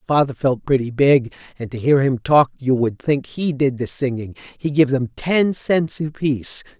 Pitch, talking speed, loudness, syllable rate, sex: 135 Hz, 195 wpm, -19 LUFS, 4.5 syllables/s, male